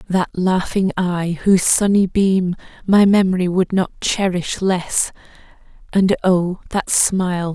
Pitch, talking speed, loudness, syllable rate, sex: 185 Hz, 125 wpm, -17 LUFS, 3.9 syllables/s, female